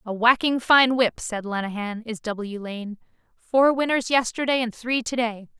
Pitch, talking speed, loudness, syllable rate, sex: 235 Hz, 160 wpm, -22 LUFS, 4.4 syllables/s, female